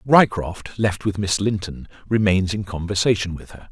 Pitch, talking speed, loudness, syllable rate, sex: 100 Hz, 160 wpm, -21 LUFS, 4.7 syllables/s, male